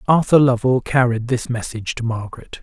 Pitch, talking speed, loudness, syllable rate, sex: 120 Hz, 160 wpm, -18 LUFS, 5.7 syllables/s, male